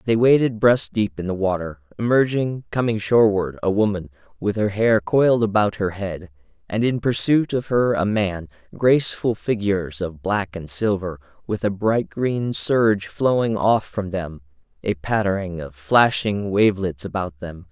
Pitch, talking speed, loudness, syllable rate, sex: 100 Hz, 165 wpm, -21 LUFS, 4.6 syllables/s, male